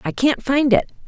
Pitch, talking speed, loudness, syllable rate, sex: 255 Hz, 225 wpm, -18 LUFS, 4.9 syllables/s, female